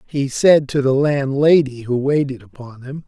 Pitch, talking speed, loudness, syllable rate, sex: 135 Hz, 175 wpm, -16 LUFS, 4.6 syllables/s, male